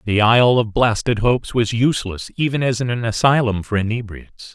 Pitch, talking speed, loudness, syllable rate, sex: 115 Hz, 170 wpm, -18 LUFS, 5.5 syllables/s, male